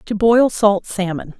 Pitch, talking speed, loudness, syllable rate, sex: 205 Hz, 170 wpm, -16 LUFS, 3.9 syllables/s, female